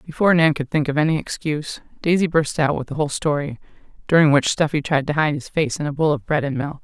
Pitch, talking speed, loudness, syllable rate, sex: 150 Hz, 255 wpm, -20 LUFS, 6.5 syllables/s, female